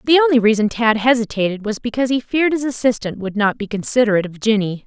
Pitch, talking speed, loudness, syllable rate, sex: 230 Hz, 210 wpm, -17 LUFS, 6.8 syllables/s, female